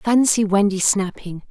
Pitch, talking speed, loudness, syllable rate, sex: 200 Hz, 120 wpm, -18 LUFS, 4.2 syllables/s, female